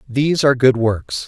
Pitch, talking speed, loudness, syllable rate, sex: 130 Hz, 190 wpm, -16 LUFS, 5.4 syllables/s, male